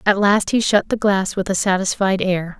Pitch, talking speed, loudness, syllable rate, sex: 195 Hz, 230 wpm, -18 LUFS, 4.9 syllables/s, female